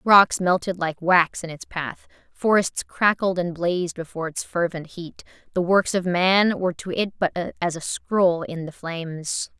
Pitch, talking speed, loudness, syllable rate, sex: 175 Hz, 180 wpm, -23 LUFS, 4.3 syllables/s, female